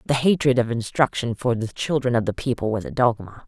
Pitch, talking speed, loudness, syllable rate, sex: 125 Hz, 225 wpm, -22 LUFS, 5.6 syllables/s, female